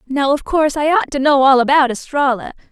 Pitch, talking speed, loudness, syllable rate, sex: 280 Hz, 220 wpm, -15 LUFS, 5.8 syllables/s, female